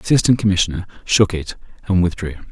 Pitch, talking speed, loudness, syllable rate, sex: 95 Hz, 165 wpm, -18 LUFS, 6.7 syllables/s, male